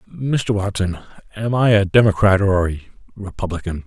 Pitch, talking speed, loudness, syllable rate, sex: 100 Hz, 140 wpm, -18 LUFS, 4.7 syllables/s, male